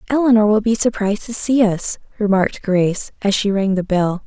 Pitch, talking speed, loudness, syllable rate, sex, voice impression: 210 Hz, 195 wpm, -17 LUFS, 5.6 syllables/s, female, very feminine, slightly young, very thin, tensed, slightly powerful, bright, soft, clear, fluent, cute, very intellectual, refreshing, sincere, very calm, very friendly, reassuring, very unique, very elegant, wild, very sweet, lively, very kind, slightly modest, slightly light